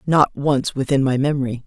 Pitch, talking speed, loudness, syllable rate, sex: 135 Hz, 180 wpm, -19 LUFS, 5.2 syllables/s, female